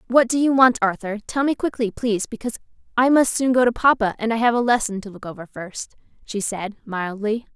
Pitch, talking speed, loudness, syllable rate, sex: 225 Hz, 220 wpm, -21 LUFS, 5.8 syllables/s, female